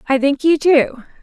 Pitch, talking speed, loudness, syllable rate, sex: 300 Hz, 195 wpm, -15 LUFS, 4.4 syllables/s, female